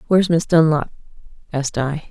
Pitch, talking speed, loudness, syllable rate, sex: 155 Hz, 140 wpm, -18 LUFS, 6.1 syllables/s, female